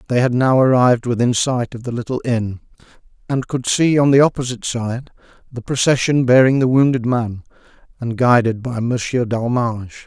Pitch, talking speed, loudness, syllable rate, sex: 125 Hz, 165 wpm, -17 LUFS, 5.3 syllables/s, male